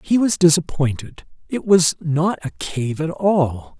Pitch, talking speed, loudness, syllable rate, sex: 160 Hz, 160 wpm, -19 LUFS, 3.9 syllables/s, male